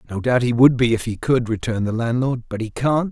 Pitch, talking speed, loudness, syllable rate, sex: 120 Hz, 270 wpm, -19 LUFS, 5.8 syllables/s, male